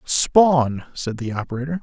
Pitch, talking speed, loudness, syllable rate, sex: 135 Hz, 130 wpm, -20 LUFS, 4.3 syllables/s, male